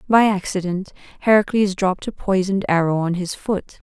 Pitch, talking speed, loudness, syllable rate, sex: 190 Hz, 155 wpm, -20 LUFS, 5.4 syllables/s, female